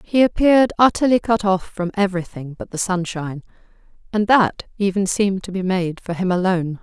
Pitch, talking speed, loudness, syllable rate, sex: 195 Hz, 175 wpm, -19 LUFS, 5.7 syllables/s, female